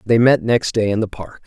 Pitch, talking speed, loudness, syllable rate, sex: 110 Hz, 285 wpm, -17 LUFS, 5.3 syllables/s, male